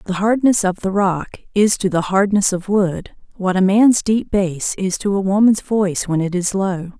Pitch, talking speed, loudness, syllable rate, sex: 195 Hz, 215 wpm, -17 LUFS, 4.6 syllables/s, female